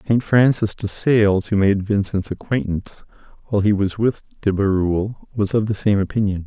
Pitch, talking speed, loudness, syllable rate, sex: 105 Hz, 175 wpm, -19 LUFS, 5.2 syllables/s, male